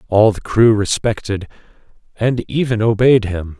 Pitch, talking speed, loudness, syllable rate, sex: 110 Hz, 135 wpm, -16 LUFS, 4.4 syllables/s, male